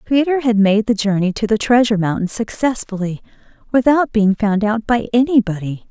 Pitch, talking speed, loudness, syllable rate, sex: 220 Hz, 165 wpm, -16 LUFS, 5.4 syllables/s, female